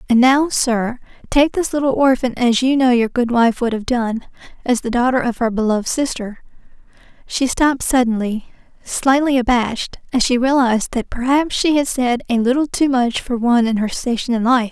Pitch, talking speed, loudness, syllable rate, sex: 245 Hz, 190 wpm, -17 LUFS, 5.2 syllables/s, female